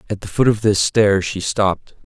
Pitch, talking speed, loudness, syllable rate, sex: 100 Hz, 230 wpm, -17 LUFS, 5.0 syllables/s, male